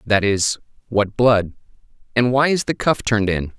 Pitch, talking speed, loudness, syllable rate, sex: 110 Hz, 185 wpm, -19 LUFS, 4.8 syllables/s, male